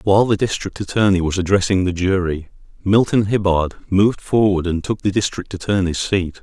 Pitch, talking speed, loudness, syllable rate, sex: 95 Hz, 170 wpm, -18 LUFS, 5.5 syllables/s, male